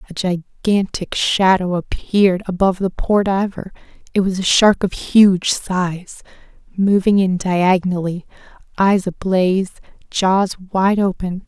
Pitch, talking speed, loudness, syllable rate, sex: 190 Hz, 120 wpm, -17 LUFS, 4.1 syllables/s, female